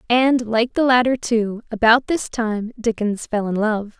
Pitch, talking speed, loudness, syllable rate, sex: 230 Hz, 180 wpm, -19 LUFS, 4.1 syllables/s, female